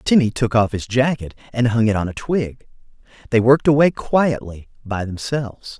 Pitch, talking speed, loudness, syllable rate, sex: 120 Hz, 175 wpm, -19 LUFS, 5.1 syllables/s, male